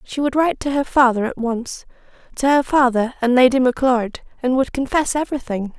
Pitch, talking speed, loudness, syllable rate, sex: 255 Hz, 165 wpm, -18 LUFS, 5.5 syllables/s, female